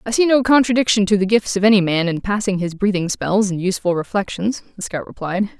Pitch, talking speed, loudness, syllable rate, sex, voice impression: 200 Hz, 225 wpm, -18 LUFS, 6.1 syllables/s, female, feminine, very adult-like, slightly intellectual, elegant